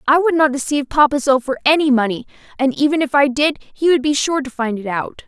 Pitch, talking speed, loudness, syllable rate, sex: 275 Hz, 250 wpm, -17 LUFS, 5.9 syllables/s, female